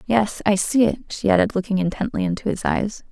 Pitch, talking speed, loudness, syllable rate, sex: 200 Hz, 210 wpm, -21 LUFS, 5.5 syllables/s, female